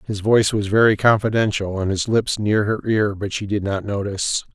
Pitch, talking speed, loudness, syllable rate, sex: 105 Hz, 210 wpm, -19 LUFS, 5.4 syllables/s, male